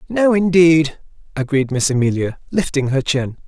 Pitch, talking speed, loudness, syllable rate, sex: 150 Hz, 140 wpm, -17 LUFS, 4.7 syllables/s, male